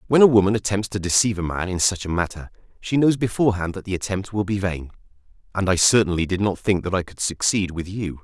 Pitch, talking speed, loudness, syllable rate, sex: 95 Hz, 240 wpm, -21 LUFS, 6.3 syllables/s, male